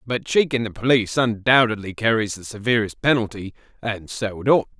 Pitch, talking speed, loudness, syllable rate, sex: 115 Hz, 165 wpm, -21 LUFS, 5.6 syllables/s, male